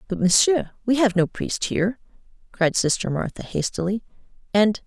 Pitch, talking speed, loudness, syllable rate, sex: 200 Hz, 150 wpm, -22 LUFS, 5.1 syllables/s, female